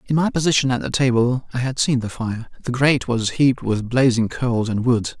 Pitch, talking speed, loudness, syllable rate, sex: 125 Hz, 230 wpm, -20 LUFS, 5.6 syllables/s, male